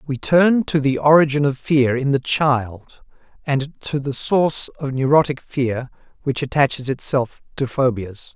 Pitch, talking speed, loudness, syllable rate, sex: 140 Hz, 160 wpm, -19 LUFS, 4.4 syllables/s, male